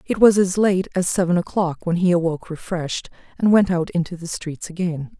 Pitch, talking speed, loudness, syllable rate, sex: 175 Hz, 210 wpm, -20 LUFS, 5.6 syllables/s, female